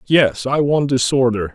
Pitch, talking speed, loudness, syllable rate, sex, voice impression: 130 Hz, 155 wpm, -17 LUFS, 4.3 syllables/s, male, masculine, middle-aged, thick, tensed, powerful, slightly bright, clear, slightly cool, calm, mature, friendly, reassuring, wild, lively, kind